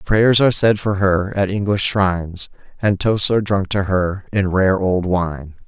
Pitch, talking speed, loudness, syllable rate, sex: 95 Hz, 190 wpm, -17 LUFS, 4.3 syllables/s, male